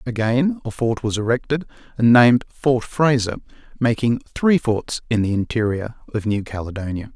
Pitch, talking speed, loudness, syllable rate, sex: 115 Hz, 150 wpm, -20 LUFS, 5.1 syllables/s, male